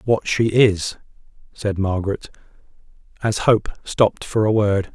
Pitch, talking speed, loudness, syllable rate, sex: 105 Hz, 135 wpm, -20 LUFS, 4.2 syllables/s, male